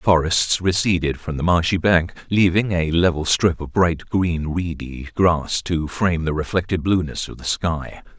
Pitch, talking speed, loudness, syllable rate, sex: 85 Hz, 175 wpm, -20 LUFS, 4.5 syllables/s, male